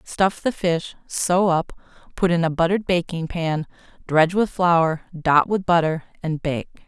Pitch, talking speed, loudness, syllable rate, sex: 170 Hz, 165 wpm, -21 LUFS, 4.4 syllables/s, female